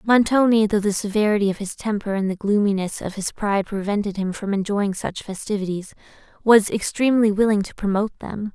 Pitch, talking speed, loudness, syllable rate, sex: 205 Hz, 175 wpm, -21 LUFS, 5.8 syllables/s, female